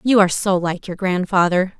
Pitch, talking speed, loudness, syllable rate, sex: 185 Hz, 200 wpm, -18 LUFS, 5.4 syllables/s, female